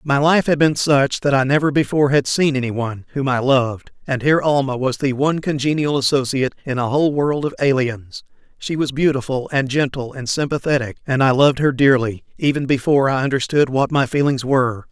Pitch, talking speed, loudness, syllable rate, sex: 135 Hz, 195 wpm, -18 LUFS, 5.8 syllables/s, male